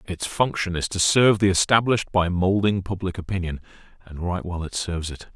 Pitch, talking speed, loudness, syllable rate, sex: 95 Hz, 190 wpm, -22 LUFS, 5.7 syllables/s, male